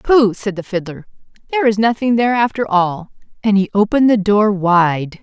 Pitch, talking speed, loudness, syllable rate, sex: 210 Hz, 170 wpm, -15 LUFS, 5.1 syllables/s, female